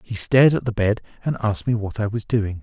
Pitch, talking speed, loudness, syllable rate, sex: 110 Hz, 275 wpm, -21 LUFS, 6.3 syllables/s, male